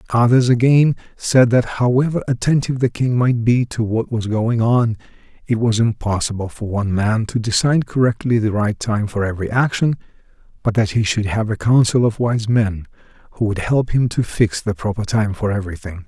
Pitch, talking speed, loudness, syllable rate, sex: 115 Hz, 190 wpm, -18 LUFS, 5.3 syllables/s, male